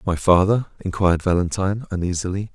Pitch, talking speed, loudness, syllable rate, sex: 95 Hz, 120 wpm, -20 LUFS, 6.2 syllables/s, male